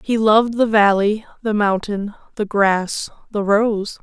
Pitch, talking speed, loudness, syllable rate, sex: 210 Hz, 150 wpm, -18 LUFS, 3.9 syllables/s, female